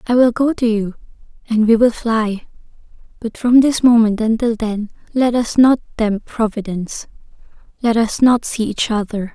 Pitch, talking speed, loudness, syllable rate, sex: 225 Hz, 165 wpm, -16 LUFS, 4.7 syllables/s, female